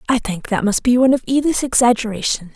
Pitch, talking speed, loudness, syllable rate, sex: 240 Hz, 210 wpm, -17 LUFS, 6.5 syllables/s, female